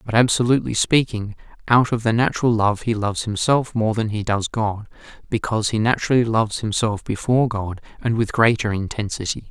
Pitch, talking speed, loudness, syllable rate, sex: 110 Hz, 170 wpm, -20 LUFS, 5.8 syllables/s, male